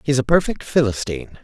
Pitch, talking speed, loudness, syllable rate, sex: 125 Hz, 170 wpm, -20 LUFS, 6.1 syllables/s, male